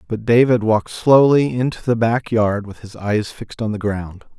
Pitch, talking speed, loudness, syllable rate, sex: 110 Hz, 205 wpm, -17 LUFS, 4.9 syllables/s, male